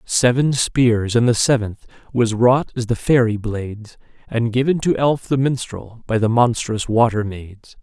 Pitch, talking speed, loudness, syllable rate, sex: 120 Hz, 170 wpm, -18 LUFS, 4.3 syllables/s, male